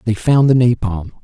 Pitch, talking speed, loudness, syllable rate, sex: 115 Hz, 195 wpm, -14 LUFS, 5.1 syllables/s, male